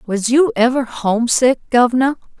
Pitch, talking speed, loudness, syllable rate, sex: 245 Hz, 125 wpm, -15 LUFS, 5.2 syllables/s, female